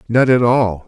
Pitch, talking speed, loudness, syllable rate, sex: 115 Hz, 205 wpm, -14 LUFS, 4.2 syllables/s, male